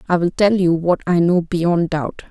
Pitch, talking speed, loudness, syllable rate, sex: 175 Hz, 235 wpm, -17 LUFS, 4.4 syllables/s, female